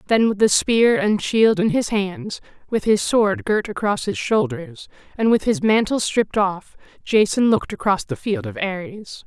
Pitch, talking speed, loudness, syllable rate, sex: 210 Hz, 190 wpm, -19 LUFS, 4.4 syllables/s, female